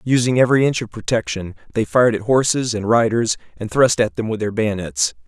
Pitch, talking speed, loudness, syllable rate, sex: 110 Hz, 205 wpm, -18 LUFS, 5.8 syllables/s, male